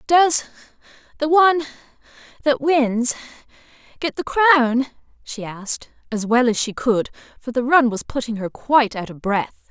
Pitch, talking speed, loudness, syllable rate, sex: 260 Hz, 135 wpm, -19 LUFS, 4.6 syllables/s, female